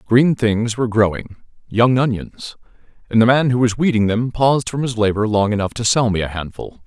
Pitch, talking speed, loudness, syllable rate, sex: 115 Hz, 190 wpm, -17 LUFS, 5.4 syllables/s, male